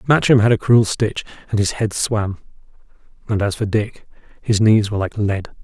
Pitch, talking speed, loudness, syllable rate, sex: 105 Hz, 190 wpm, -18 LUFS, 5.2 syllables/s, male